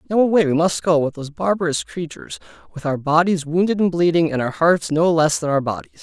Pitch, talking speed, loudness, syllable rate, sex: 165 Hz, 230 wpm, -19 LUFS, 6.0 syllables/s, male